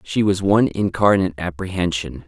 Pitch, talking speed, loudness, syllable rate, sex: 90 Hz, 130 wpm, -19 LUFS, 5.6 syllables/s, male